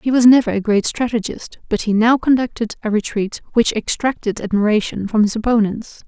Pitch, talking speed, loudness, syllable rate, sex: 225 Hz, 180 wpm, -17 LUFS, 5.4 syllables/s, female